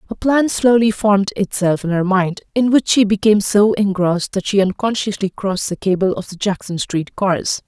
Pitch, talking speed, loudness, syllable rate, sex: 200 Hz, 195 wpm, -17 LUFS, 5.2 syllables/s, female